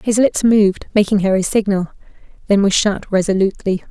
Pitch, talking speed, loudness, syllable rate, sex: 200 Hz, 170 wpm, -16 LUFS, 6.0 syllables/s, female